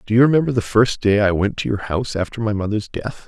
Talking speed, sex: 275 wpm, male